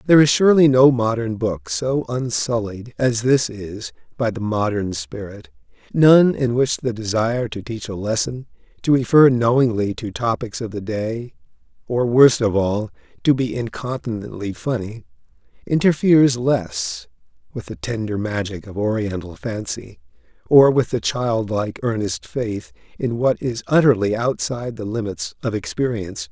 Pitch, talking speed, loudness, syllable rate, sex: 115 Hz, 145 wpm, -20 LUFS, 4.6 syllables/s, male